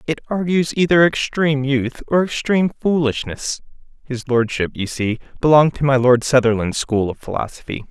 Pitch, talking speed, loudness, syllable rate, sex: 140 Hz, 150 wpm, -18 LUFS, 5.2 syllables/s, male